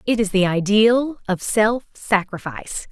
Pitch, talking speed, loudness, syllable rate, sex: 210 Hz, 145 wpm, -19 LUFS, 4.2 syllables/s, female